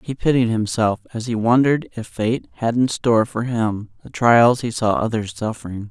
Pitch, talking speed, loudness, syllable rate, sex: 115 Hz, 195 wpm, -19 LUFS, 5.0 syllables/s, male